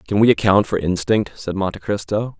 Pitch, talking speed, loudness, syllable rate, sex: 100 Hz, 200 wpm, -19 LUFS, 5.3 syllables/s, male